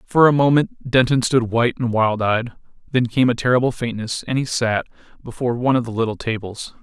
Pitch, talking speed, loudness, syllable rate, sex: 120 Hz, 200 wpm, -19 LUFS, 5.9 syllables/s, male